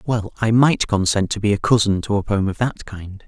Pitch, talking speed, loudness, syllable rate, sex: 105 Hz, 255 wpm, -19 LUFS, 5.2 syllables/s, male